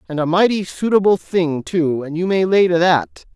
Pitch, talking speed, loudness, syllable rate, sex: 175 Hz, 215 wpm, -17 LUFS, 5.1 syllables/s, male